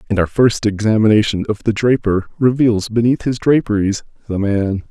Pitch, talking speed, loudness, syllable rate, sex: 110 Hz, 145 wpm, -16 LUFS, 5.2 syllables/s, male